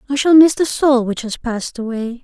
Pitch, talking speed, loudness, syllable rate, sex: 255 Hz, 240 wpm, -15 LUFS, 5.4 syllables/s, female